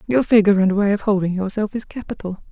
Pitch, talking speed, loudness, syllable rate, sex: 205 Hz, 215 wpm, -19 LUFS, 6.5 syllables/s, female